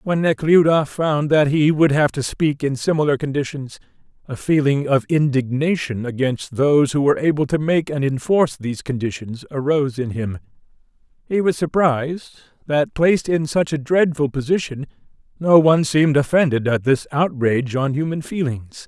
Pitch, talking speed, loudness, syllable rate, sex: 145 Hz, 160 wpm, -19 LUFS, 5.1 syllables/s, male